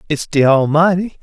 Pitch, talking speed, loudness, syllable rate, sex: 160 Hz, 145 wpm, -14 LUFS, 5.0 syllables/s, male